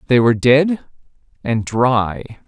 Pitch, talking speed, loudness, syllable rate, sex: 125 Hz, 120 wpm, -16 LUFS, 4.0 syllables/s, male